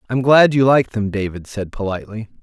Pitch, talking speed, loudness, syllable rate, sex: 115 Hz, 200 wpm, -16 LUFS, 5.7 syllables/s, male